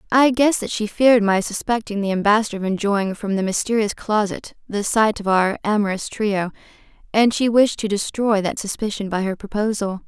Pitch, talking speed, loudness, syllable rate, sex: 210 Hz, 185 wpm, -20 LUFS, 5.4 syllables/s, female